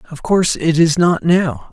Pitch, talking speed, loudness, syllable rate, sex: 170 Hz, 210 wpm, -15 LUFS, 4.8 syllables/s, male